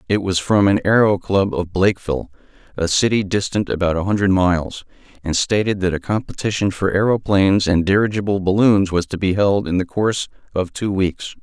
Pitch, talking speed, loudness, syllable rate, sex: 95 Hz, 185 wpm, -18 LUFS, 5.6 syllables/s, male